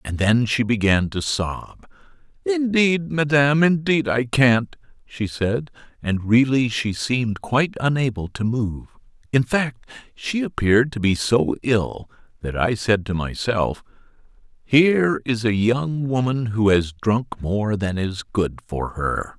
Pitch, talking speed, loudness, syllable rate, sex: 120 Hz, 150 wpm, -21 LUFS, 3.9 syllables/s, male